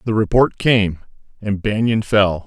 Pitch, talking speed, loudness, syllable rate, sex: 105 Hz, 145 wpm, -17 LUFS, 4.1 syllables/s, male